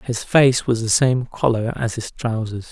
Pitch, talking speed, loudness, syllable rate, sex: 120 Hz, 200 wpm, -19 LUFS, 4.3 syllables/s, male